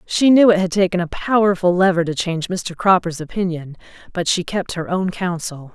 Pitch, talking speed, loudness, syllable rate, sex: 180 Hz, 200 wpm, -18 LUFS, 5.3 syllables/s, female